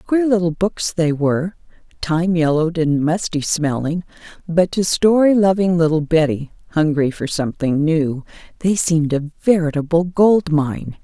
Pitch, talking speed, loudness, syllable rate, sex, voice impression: 165 Hz, 140 wpm, -17 LUFS, 4.6 syllables/s, female, feminine, slightly gender-neutral, very adult-like, slightly old, thin, tensed, slightly powerful, bright, hard, very clear, very fluent, raspy, cool, very intellectual, slightly refreshing, very sincere, very calm, mature, friendly, very reassuring, very unique, slightly elegant, very wild, sweet, kind, modest